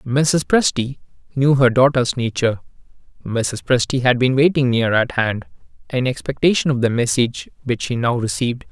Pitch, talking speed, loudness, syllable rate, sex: 125 Hz, 160 wpm, -18 LUFS, 5.1 syllables/s, male